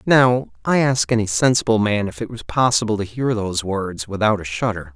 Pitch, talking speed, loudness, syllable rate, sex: 110 Hz, 205 wpm, -19 LUFS, 5.3 syllables/s, male